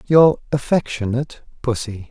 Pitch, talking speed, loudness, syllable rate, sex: 130 Hz, 85 wpm, -19 LUFS, 4.7 syllables/s, male